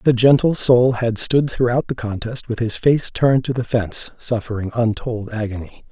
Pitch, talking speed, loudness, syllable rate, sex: 120 Hz, 185 wpm, -19 LUFS, 4.9 syllables/s, male